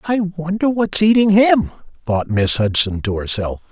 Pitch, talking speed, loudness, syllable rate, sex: 160 Hz, 160 wpm, -16 LUFS, 4.4 syllables/s, male